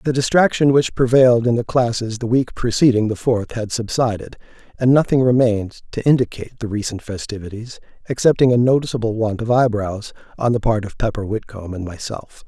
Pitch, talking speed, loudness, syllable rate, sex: 115 Hz, 175 wpm, -18 LUFS, 5.7 syllables/s, male